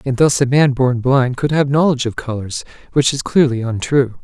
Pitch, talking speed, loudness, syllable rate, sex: 130 Hz, 215 wpm, -16 LUFS, 5.2 syllables/s, male